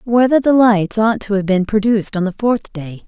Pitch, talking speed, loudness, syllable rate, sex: 210 Hz, 235 wpm, -15 LUFS, 5.2 syllables/s, female